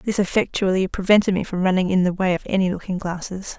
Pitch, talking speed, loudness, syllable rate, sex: 190 Hz, 220 wpm, -21 LUFS, 6.2 syllables/s, female